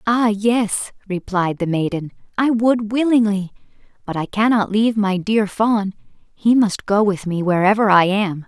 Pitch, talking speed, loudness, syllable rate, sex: 205 Hz, 165 wpm, -18 LUFS, 4.4 syllables/s, female